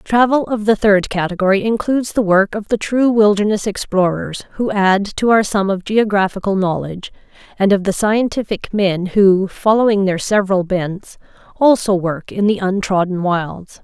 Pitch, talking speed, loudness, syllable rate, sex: 200 Hz, 160 wpm, -16 LUFS, 4.8 syllables/s, female